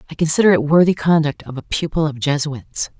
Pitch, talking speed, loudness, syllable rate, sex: 155 Hz, 200 wpm, -17 LUFS, 5.9 syllables/s, female